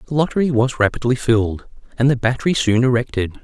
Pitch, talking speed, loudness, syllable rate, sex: 125 Hz, 175 wpm, -18 LUFS, 6.6 syllables/s, male